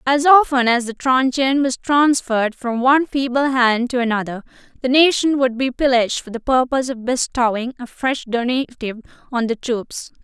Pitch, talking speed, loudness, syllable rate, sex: 255 Hz, 170 wpm, -18 LUFS, 5.1 syllables/s, female